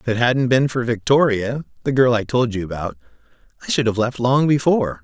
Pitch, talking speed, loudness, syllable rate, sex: 120 Hz, 190 wpm, -19 LUFS, 5.6 syllables/s, male